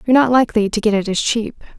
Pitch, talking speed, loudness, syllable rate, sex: 225 Hz, 270 wpm, -16 LUFS, 7.5 syllables/s, female